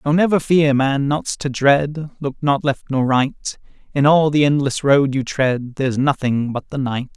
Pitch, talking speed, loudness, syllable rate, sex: 140 Hz, 200 wpm, -18 LUFS, 4.4 syllables/s, male